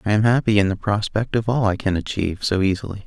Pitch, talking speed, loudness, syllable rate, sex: 105 Hz, 255 wpm, -20 LUFS, 6.5 syllables/s, male